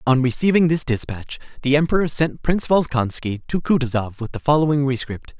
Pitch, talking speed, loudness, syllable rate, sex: 140 Hz, 165 wpm, -20 LUFS, 5.7 syllables/s, male